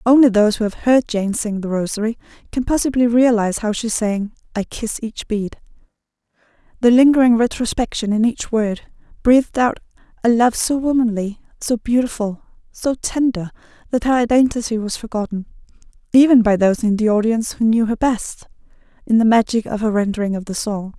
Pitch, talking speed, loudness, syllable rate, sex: 225 Hz, 165 wpm, -18 LUFS, 5.6 syllables/s, female